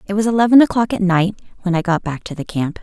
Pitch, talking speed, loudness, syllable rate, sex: 195 Hz, 275 wpm, -17 LUFS, 6.5 syllables/s, female